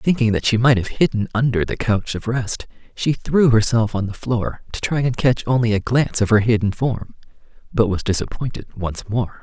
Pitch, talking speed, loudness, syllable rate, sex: 115 Hz, 210 wpm, -20 LUFS, 5.1 syllables/s, male